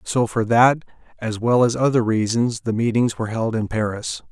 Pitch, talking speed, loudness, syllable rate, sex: 115 Hz, 195 wpm, -20 LUFS, 5.1 syllables/s, male